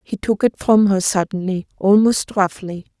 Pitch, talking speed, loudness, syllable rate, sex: 195 Hz, 160 wpm, -17 LUFS, 4.5 syllables/s, female